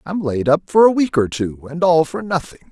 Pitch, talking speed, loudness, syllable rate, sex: 160 Hz, 265 wpm, -17 LUFS, 5.2 syllables/s, male